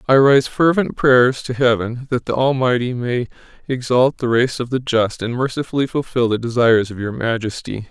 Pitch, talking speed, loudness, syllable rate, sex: 125 Hz, 180 wpm, -18 LUFS, 5.2 syllables/s, male